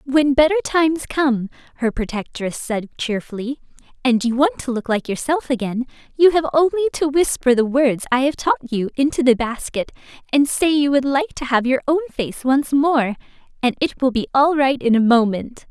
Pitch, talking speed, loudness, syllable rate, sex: 265 Hz, 195 wpm, -19 LUFS, 5.1 syllables/s, female